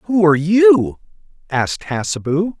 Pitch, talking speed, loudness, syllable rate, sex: 165 Hz, 115 wpm, -16 LUFS, 4.4 syllables/s, male